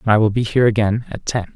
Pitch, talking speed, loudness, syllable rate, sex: 110 Hz, 310 wpm, -18 LUFS, 7.3 syllables/s, male